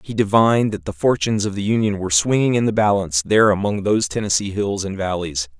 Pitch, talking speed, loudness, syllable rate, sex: 100 Hz, 215 wpm, -19 LUFS, 6.5 syllables/s, male